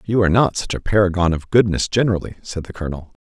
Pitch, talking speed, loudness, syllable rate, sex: 95 Hz, 240 wpm, -19 LUFS, 7.2 syllables/s, male